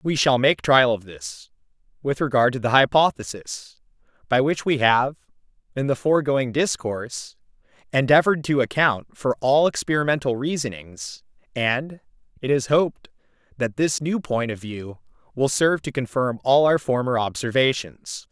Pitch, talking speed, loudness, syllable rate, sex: 130 Hz, 145 wpm, -21 LUFS, 4.7 syllables/s, male